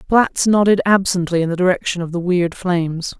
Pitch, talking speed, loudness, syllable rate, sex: 180 Hz, 190 wpm, -17 LUFS, 5.4 syllables/s, female